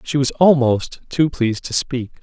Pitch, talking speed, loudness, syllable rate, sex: 130 Hz, 190 wpm, -18 LUFS, 4.4 syllables/s, male